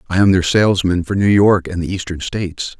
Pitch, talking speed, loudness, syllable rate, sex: 95 Hz, 235 wpm, -16 LUFS, 5.8 syllables/s, male